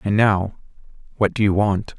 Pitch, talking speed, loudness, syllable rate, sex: 100 Hz, 180 wpm, -20 LUFS, 4.7 syllables/s, male